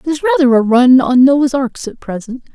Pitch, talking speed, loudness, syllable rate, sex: 270 Hz, 210 wpm, -11 LUFS, 5.0 syllables/s, female